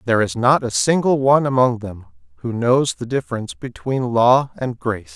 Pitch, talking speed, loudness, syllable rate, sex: 125 Hz, 185 wpm, -18 LUFS, 5.5 syllables/s, male